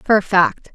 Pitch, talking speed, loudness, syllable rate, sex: 195 Hz, 240 wpm, -16 LUFS, 4.5 syllables/s, female